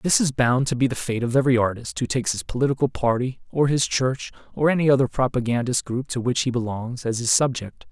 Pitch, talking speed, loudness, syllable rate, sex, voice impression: 125 Hz, 225 wpm, -22 LUFS, 6.0 syllables/s, male, very masculine, very adult-like, very middle-aged, thick, slightly relaxed, slightly powerful, slightly bright, slightly soft, slightly muffled, fluent, slightly raspy, cool, intellectual, very refreshing, sincere, very calm, very friendly, very reassuring, slightly unique, elegant, slightly wild, sweet, very lively, kind, slightly intense